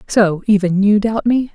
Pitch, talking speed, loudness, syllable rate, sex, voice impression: 205 Hz, 195 wpm, -15 LUFS, 4.4 syllables/s, female, feminine, adult-like, slightly calm